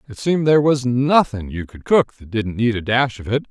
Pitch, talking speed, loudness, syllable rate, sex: 120 Hz, 255 wpm, -18 LUFS, 5.5 syllables/s, male